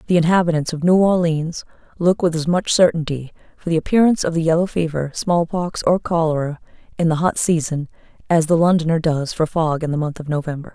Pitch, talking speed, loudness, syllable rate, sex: 165 Hz, 200 wpm, -19 LUFS, 5.9 syllables/s, female